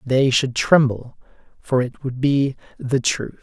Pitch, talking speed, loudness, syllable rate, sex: 130 Hz, 160 wpm, -19 LUFS, 3.8 syllables/s, male